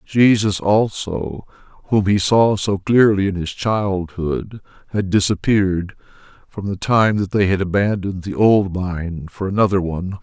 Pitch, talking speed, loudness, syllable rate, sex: 95 Hz, 145 wpm, -18 LUFS, 4.3 syllables/s, male